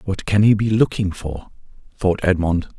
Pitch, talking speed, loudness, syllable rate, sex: 95 Hz, 170 wpm, -19 LUFS, 4.7 syllables/s, male